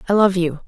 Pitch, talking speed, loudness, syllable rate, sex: 185 Hz, 270 wpm, -17 LUFS, 6.7 syllables/s, female